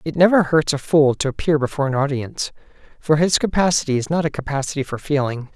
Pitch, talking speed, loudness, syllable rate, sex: 145 Hz, 205 wpm, -19 LUFS, 6.4 syllables/s, male